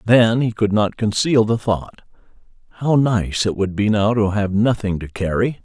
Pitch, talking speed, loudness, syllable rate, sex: 105 Hz, 190 wpm, -18 LUFS, 4.5 syllables/s, male